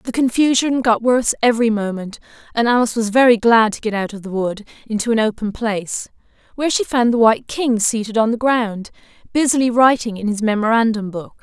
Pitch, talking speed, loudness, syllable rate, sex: 225 Hz, 195 wpm, -17 LUFS, 5.9 syllables/s, female